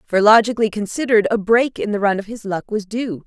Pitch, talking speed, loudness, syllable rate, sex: 215 Hz, 240 wpm, -18 LUFS, 6.1 syllables/s, female